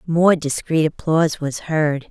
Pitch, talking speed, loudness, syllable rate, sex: 155 Hz, 140 wpm, -19 LUFS, 4.1 syllables/s, female